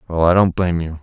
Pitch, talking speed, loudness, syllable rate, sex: 85 Hz, 295 wpm, -16 LUFS, 7.0 syllables/s, male